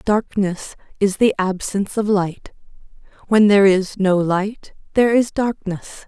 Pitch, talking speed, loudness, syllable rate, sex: 200 Hz, 140 wpm, -18 LUFS, 4.4 syllables/s, female